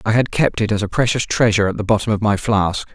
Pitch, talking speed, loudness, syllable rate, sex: 110 Hz, 285 wpm, -18 LUFS, 6.4 syllables/s, male